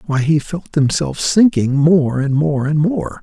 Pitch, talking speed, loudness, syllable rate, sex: 145 Hz, 185 wpm, -15 LUFS, 3.9 syllables/s, male